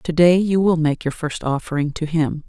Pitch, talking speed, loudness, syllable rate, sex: 160 Hz, 240 wpm, -19 LUFS, 4.9 syllables/s, female